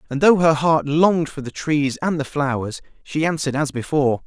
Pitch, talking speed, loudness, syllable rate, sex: 150 Hz, 210 wpm, -20 LUFS, 5.5 syllables/s, male